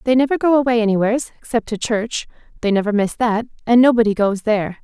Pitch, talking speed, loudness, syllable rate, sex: 225 Hz, 175 wpm, -18 LUFS, 6.4 syllables/s, female